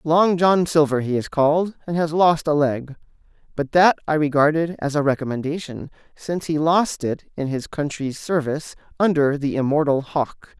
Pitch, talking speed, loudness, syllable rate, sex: 150 Hz, 170 wpm, -20 LUFS, 5.1 syllables/s, male